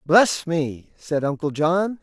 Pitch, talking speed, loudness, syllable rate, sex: 165 Hz, 150 wpm, -22 LUFS, 3.3 syllables/s, male